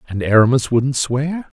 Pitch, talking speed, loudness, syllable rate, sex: 130 Hz, 150 wpm, -17 LUFS, 4.5 syllables/s, male